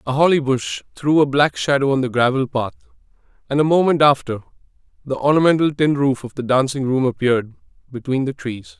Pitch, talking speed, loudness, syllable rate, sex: 135 Hz, 185 wpm, -18 LUFS, 5.7 syllables/s, male